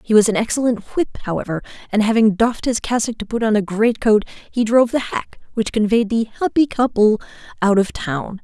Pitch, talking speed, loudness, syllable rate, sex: 220 Hz, 205 wpm, -18 LUFS, 5.6 syllables/s, female